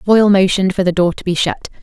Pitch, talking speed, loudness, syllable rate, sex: 190 Hz, 265 wpm, -14 LUFS, 6.8 syllables/s, female